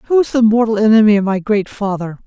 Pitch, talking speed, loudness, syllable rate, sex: 215 Hz, 240 wpm, -14 LUFS, 6.0 syllables/s, female